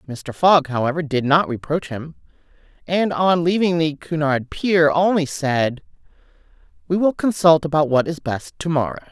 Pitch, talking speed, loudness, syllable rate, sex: 155 Hz, 160 wpm, -19 LUFS, 4.7 syllables/s, female